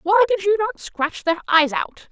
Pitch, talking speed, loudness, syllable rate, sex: 335 Hz, 225 wpm, -20 LUFS, 4.4 syllables/s, female